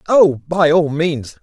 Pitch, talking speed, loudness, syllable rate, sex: 155 Hz, 170 wpm, -15 LUFS, 3.3 syllables/s, male